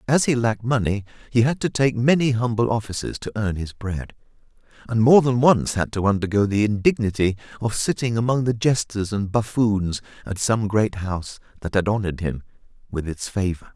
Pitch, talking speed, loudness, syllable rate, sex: 110 Hz, 185 wpm, -22 LUFS, 5.4 syllables/s, male